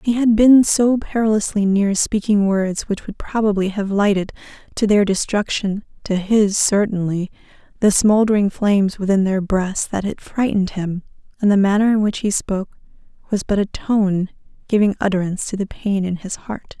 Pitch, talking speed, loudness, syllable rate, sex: 205 Hz, 165 wpm, -18 LUFS, 5.0 syllables/s, female